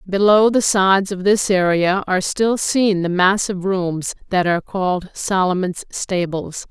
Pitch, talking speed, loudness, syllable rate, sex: 190 Hz, 150 wpm, -18 LUFS, 4.4 syllables/s, female